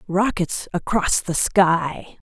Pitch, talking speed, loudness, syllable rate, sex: 180 Hz, 105 wpm, -20 LUFS, 3.0 syllables/s, female